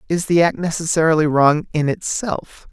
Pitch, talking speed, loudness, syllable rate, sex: 165 Hz, 155 wpm, -18 LUFS, 4.9 syllables/s, male